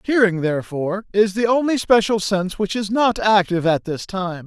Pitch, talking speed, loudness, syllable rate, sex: 200 Hz, 190 wpm, -19 LUFS, 5.4 syllables/s, male